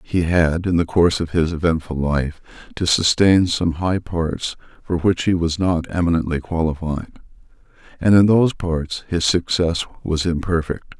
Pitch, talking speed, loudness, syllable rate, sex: 85 Hz, 160 wpm, -19 LUFS, 4.4 syllables/s, male